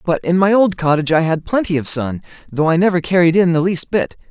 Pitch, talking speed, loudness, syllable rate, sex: 170 Hz, 250 wpm, -15 LUFS, 6.0 syllables/s, male